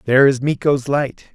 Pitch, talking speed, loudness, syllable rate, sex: 135 Hz, 180 wpm, -17 LUFS, 5.0 syllables/s, male